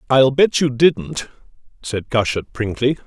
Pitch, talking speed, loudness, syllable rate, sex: 130 Hz, 135 wpm, -18 LUFS, 4.1 syllables/s, male